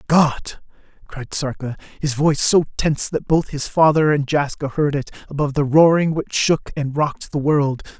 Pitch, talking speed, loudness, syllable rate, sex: 145 Hz, 180 wpm, -19 LUFS, 4.9 syllables/s, male